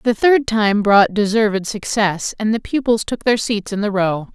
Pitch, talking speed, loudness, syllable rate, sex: 215 Hz, 205 wpm, -17 LUFS, 4.6 syllables/s, female